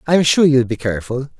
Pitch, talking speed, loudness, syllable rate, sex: 135 Hz, 215 wpm, -16 LUFS, 6.0 syllables/s, male